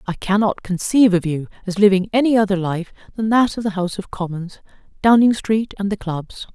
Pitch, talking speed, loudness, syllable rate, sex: 200 Hz, 200 wpm, -18 LUFS, 5.7 syllables/s, female